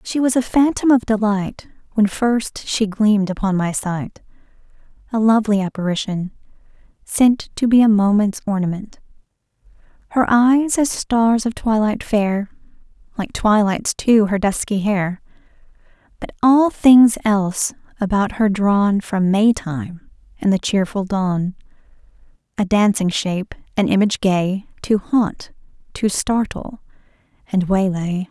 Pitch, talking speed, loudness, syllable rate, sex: 210 Hz, 130 wpm, -18 LUFS, 4.1 syllables/s, female